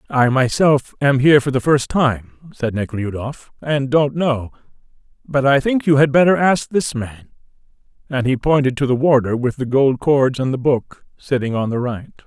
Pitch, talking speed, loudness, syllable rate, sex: 135 Hz, 190 wpm, -17 LUFS, 4.8 syllables/s, male